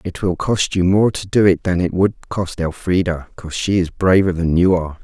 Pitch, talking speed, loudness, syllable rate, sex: 90 Hz, 240 wpm, -17 LUFS, 5.3 syllables/s, male